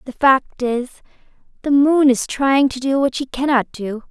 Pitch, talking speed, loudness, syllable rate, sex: 260 Hz, 190 wpm, -17 LUFS, 4.4 syllables/s, female